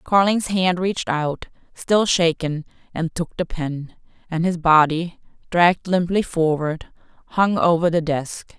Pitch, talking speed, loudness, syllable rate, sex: 170 Hz, 140 wpm, -20 LUFS, 4.1 syllables/s, female